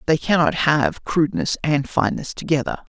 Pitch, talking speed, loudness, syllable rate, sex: 145 Hz, 145 wpm, -20 LUFS, 5.1 syllables/s, male